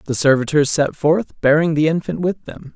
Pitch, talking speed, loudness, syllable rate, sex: 155 Hz, 195 wpm, -17 LUFS, 5.4 syllables/s, male